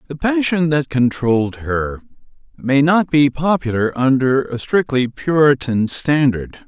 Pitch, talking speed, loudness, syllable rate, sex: 140 Hz, 125 wpm, -17 LUFS, 4.0 syllables/s, male